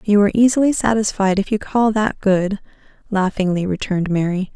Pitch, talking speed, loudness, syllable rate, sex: 200 Hz, 160 wpm, -18 LUFS, 5.7 syllables/s, female